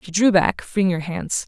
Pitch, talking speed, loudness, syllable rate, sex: 185 Hz, 245 wpm, -20 LUFS, 4.4 syllables/s, female